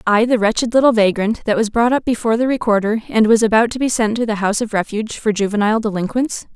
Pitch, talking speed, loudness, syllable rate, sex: 220 Hz, 240 wpm, -16 LUFS, 6.7 syllables/s, female